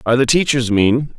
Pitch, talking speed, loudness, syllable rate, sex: 125 Hz, 200 wpm, -15 LUFS, 5.7 syllables/s, male